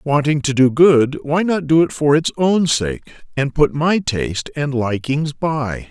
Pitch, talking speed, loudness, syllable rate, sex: 145 Hz, 195 wpm, -17 LUFS, 4.1 syllables/s, male